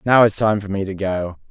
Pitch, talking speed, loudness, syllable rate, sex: 100 Hz, 280 wpm, -19 LUFS, 5.4 syllables/s, male